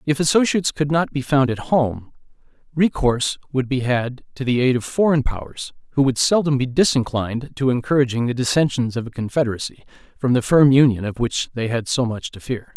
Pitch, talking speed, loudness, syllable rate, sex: 130 Hz, 195 wpm, -20 LUFS, 5.7 syllables/s, male